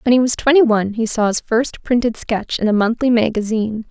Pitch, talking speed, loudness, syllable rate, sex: 230 Hz, 230 wpm, -17 LUFS, 5.8 syllables/s, female